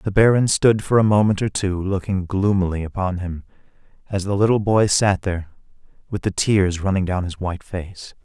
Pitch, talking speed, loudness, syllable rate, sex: 95 Hz, 190 wpm, -20 LUFS, 5.2 syllables/s, male